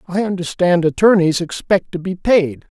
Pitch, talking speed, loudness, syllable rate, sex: 180 Hz, 150 wpm, -16 LUFS, 4.7 syllables/s, male